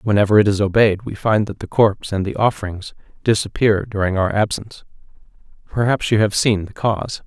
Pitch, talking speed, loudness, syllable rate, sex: 105 Hz, 180 wpm, -18 LUFS, 5.8 syllables/s, male